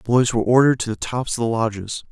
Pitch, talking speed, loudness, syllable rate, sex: 120 Hz, 285 wpm, -20 LUFS, 7.2 syllables/s, male